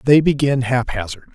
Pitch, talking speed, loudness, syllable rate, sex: 125 Hz, 135 wpm, -18 LUFS, 5.0 syllables/s, male